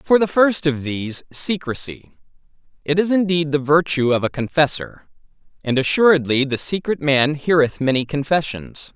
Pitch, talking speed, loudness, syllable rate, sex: 150 Hz, 145 wpm, -18 LUFS, 4.9 syllables/s, male